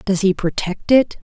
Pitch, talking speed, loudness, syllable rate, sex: 195 Hz, 185 wpm, -18 LUFS, 4.4 syllables/s, female